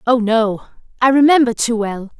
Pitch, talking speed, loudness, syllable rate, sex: 235 Hz, 165 wpm, -15 LUFS, 5.0 syllables/s, female